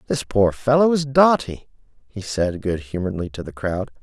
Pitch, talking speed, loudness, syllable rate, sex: 110 Hz, 180 wpm, -20 LUFS, 5.0 syllables/s, male